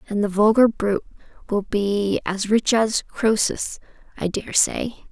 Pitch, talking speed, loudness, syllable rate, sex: 210 Hz, 150 wpm, -21 LUFS, 4.0 syllables/s, female